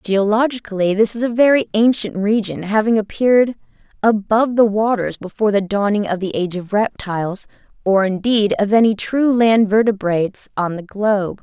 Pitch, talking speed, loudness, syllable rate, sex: 210 Hz, 160 wpm, -17 LUFS, 5.4 syllables/s, female